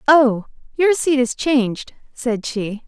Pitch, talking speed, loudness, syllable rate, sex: 255 Hz, 145 wpm, -19 LUFS, 3.6 syllables/s, female